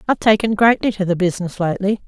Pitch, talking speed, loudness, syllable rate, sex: 200 Hz, 200 wpm, -17 LUFS, 7.4 syllables/s, female